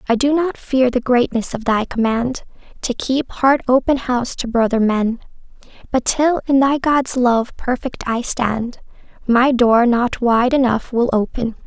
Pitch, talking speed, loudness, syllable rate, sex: 245 Hz, 170 wpm, -17 LUFS, 4.2 syllables/s, female